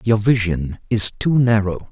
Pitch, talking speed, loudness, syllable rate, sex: 105 Hz, 155 wpm, -18 LUFS, 4.3 syllables/s, male